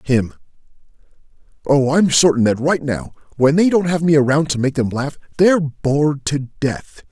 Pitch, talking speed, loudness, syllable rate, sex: 140 Hz, 175 wpm, -17 LUFS, 4.8 syllables/s, male